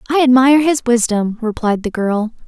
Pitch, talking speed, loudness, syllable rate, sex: 240 Hz, 170 wpm, -15 LUFS, 5.3 syllables/s, female